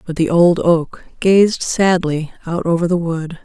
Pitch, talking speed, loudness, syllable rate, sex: 170 Hz, 175 wpm, -16 LUFS, 3.9 syllables/s, female